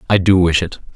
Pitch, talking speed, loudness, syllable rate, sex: 90 Hz, 255 wpm, -14 LUFS, 6.1 syllables/s, male